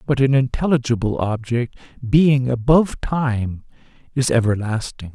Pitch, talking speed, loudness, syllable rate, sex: 125 Hz, 105 wpm, -19 LUFS, 4.5 syllables/s, male